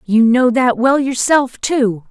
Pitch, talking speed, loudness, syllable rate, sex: 245 Hz, 170 wpm, -14 LUFS, 3.5 syllables/s, female